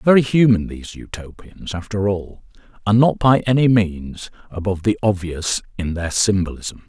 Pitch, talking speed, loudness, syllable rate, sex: 100 Hz, 150 wpm, -18 LUFS, 4.8 syllables/s, male